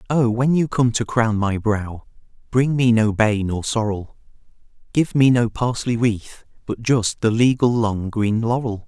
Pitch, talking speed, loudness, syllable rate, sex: 115 Hz, 175 wpm, -19 LUFS, 4.1 syllables/s, male